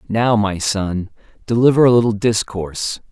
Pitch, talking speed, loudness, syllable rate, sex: 105 Hz, 135 wpm, -17 LUFS, 4.7 syllables/s, male